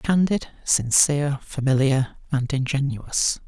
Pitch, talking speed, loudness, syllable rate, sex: 140 Hz, 85 wpm, -22 LUFS, 3.9 syllables/s, male